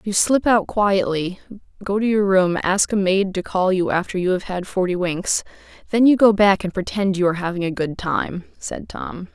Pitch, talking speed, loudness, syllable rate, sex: 190 Hz, 220 wpm, -20 LUFS, 4.9 syllables/s, female